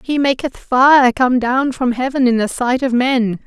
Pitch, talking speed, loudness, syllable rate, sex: 255 Hz, 210 wpm, -15 LUFS, 4.2 syllables/s, female